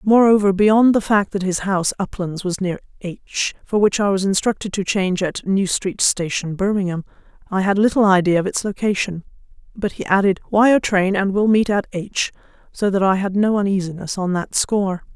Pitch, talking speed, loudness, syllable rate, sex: 195 Hz, 195 wpm, -18 LUFS, 5.2 syllables/s, female